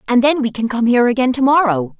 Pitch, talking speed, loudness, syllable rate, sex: 245 Hz, 270 wpm, -15 LUFS, 6.6 syllables/s, female